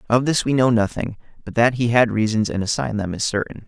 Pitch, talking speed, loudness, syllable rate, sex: 115 Hz, 245 wpm, -20 LUFS, 6.2 syllables/s, male